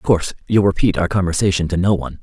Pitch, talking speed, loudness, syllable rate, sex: 90 Hz, 245 wpm, -17 LUFS, 7.3 syllables/s, male